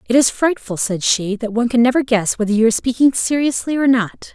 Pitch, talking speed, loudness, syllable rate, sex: 240 Hz, 235 wpm, -17 LUFS, 5.9 syllables/s, female